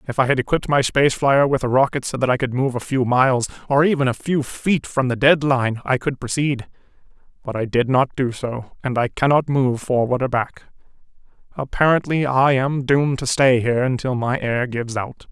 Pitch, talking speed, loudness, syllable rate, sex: 130 Hz, 215 wpm, -19 LUFS, 5.4 syllables/s, male